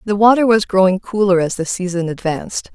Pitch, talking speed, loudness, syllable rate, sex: 195 Hz, 195 wpm, -16 LUFS, 5.7 syllables/s, female